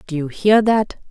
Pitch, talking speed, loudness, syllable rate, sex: 195 Hz, 215 wpm, -17 LUFS, 4.7 syllables/s, female